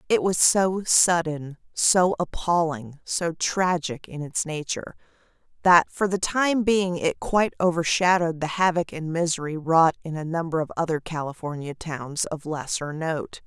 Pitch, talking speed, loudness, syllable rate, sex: 165 Hz, 150 wpm, -23 LUFS, 4.4 syllables/s, female